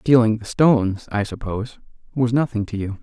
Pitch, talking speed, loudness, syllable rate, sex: 115 Hz, 180 wpm, -20 LUFS, 5.3 syllables/s, male